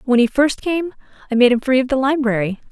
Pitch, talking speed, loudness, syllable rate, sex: 260 Hz, 245 wpm, -17 LUFS, 6.0 syllables/s, female